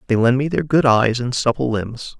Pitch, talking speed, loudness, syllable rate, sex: 125 Hz, 245 wpm, -18 LUFS, 5.0 syllables/s, male